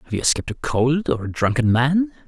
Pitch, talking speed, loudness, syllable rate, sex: 125 Hz, 235 wpm, -20 LUFS, 5.9 syllables/s, male